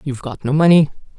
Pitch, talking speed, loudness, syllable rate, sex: 145 Hz, 200 wpm, -16 LUFS, 7.2 syllables/s, female